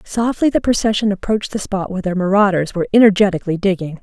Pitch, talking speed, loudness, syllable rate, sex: 200 Hz, 180 wpm, -16 LUFS, 7.0 syllables/s, female